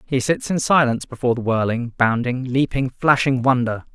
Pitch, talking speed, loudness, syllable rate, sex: 130 Hz, 165 wpm, -19 LUFS, 5.4 syllables/s, male